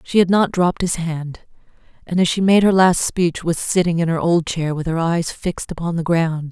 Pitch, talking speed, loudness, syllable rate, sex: 170 Hz, 240 wpm, -18 LUFS, 5.1 syllables/s, female